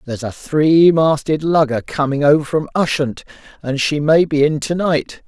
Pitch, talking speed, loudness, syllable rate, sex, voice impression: 150 Hz, 180 wpm, -16 LUFS, 4.7 syllables/s, male, masculine, adult-like, tensed, slightly powerful, soft, intellectual, calm, friendly, reassuring, slightly unique, lively, kind